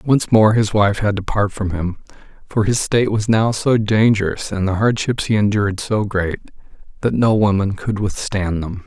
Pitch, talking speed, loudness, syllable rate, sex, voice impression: 105 Hz, 195 wpm, -18 LUFS, 4.9 syllables/s, male, masculine, very adult-like, slightly thick, cool, sincere, slightly calm